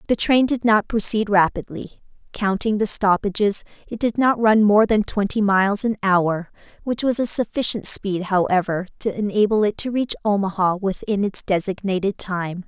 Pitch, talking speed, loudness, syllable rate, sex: 205 Hz, 165 wpm, -20 LUFS, 4.8 syllables/s, female